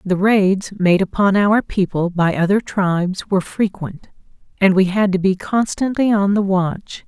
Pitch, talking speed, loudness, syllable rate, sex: 195 Hz, 170 wpm, -17 LUFS, 4.3 syllables/s, female